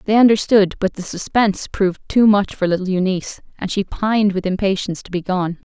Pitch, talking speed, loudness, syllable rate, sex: 195 Hz, 200 wpm, -18 LUFS, 5.9 syllables/s, female